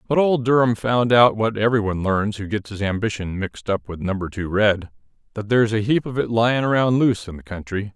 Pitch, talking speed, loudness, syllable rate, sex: 110 Hz, 225 wpm, -20 LUFS, 6.0 syllables/s, male